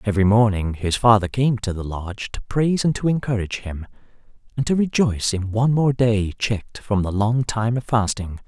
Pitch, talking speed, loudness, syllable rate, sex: 110 Hz, 200 wpm, -21 LUFS, 5.6 syllables/s, male